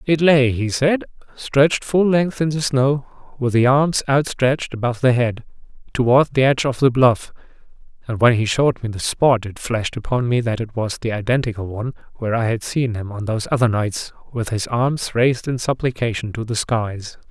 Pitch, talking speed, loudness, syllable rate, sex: 125 Hz, 200 wpm, -19 LUFS, 5.3 syllables/s, male